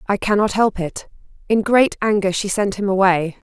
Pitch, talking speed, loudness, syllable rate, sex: 200 Hz, 190 wpm, -18 LUFS, 5.0 syllables/s, female